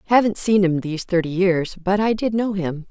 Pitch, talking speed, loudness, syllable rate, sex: 190 Hz, 225 wpm, -20 LUFS, 5.3 syllables/s, female